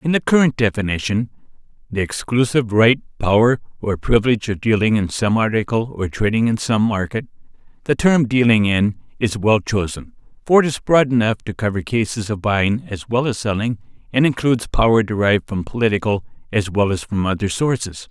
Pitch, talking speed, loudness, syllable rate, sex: 110 Hz, 175 wpm, -18 LUFS, 5.5 syllables/s, male